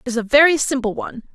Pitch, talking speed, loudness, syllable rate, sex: 260 Hz, 220 wpm, -16 LUFS, 7.0 syllables/s, female